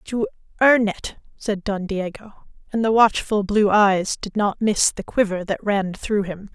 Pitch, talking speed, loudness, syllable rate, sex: 210 Hz, 185 wpm, -20 LUFS, 4.2 syllables/s, female